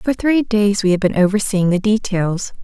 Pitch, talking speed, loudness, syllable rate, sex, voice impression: 200 Hz, 205 wpm, -16 LUFS, 4.7 syllables/s, female, feminine, slightly adult-like, slightly intellectual, calm